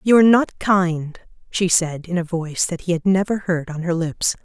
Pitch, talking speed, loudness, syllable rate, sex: 175 Hz, 215 wpm, -19 LUFS, 4.8 syllables/s, female